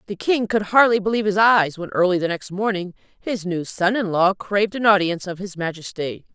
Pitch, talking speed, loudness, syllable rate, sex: 195 Hz, 215 wpm, -20 LUFS, 5.5 syllables/s, female